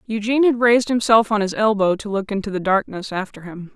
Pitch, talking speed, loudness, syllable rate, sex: 210 Hz, 225 wpm, -19 LUFS, 6.0 syllables/s, female